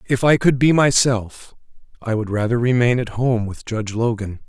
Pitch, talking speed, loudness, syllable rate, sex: 120 Hz, 190 wpm, -18 LUFS, 4.9 syllables/s, male